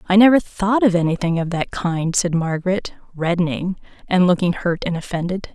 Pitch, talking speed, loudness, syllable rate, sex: 180 Hz, 175 wpm, -19 LUFS, 5.4 syllables/s, female